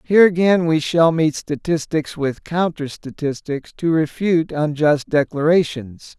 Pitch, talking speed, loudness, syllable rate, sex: 155 Hz, 125 wpm, -19 LUFS, 4.3 syllables/s, male